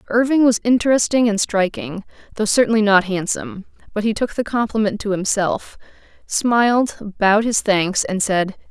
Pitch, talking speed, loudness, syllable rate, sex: 215 Hz, 150 wpm, -18 LUFS, 5.0 syllables/s, female